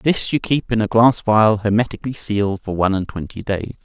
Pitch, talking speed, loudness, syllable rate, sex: 110 Hz, 220 wpm, -18 LUFS, 5.6 syllables/s, male